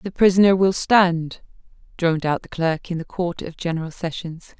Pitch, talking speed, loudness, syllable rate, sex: 175 Hz, 185 wpm, -20 LUFS, 5.1 syllables/s, female